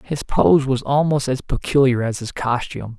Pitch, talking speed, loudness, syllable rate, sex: 130 Hz, 180 wpm, -19 LUFS, 4.8 syllables/s, male